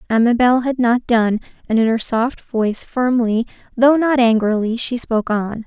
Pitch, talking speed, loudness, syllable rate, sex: 235 Hz, 170 wpm, -17 LUFS, 4.7 syllables/s, female